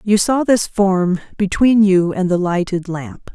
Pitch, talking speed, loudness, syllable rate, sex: 195 Hz, 180 wpm, -16 LUFS, 3.9 syllables/s, female